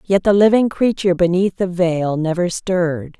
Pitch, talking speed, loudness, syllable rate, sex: 180 Hz, 170 wpm, -17 LUFS, 4.9 syllables/s, female